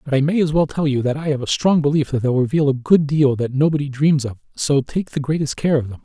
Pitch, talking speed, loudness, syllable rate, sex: 140 Hz, 300 wpm, -18 LUFS, 6.1 syllables/s, male